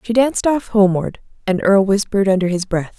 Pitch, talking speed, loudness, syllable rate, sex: 205 Hz, 200 wpm, -16 LUFS, 6.4 syllables/s, female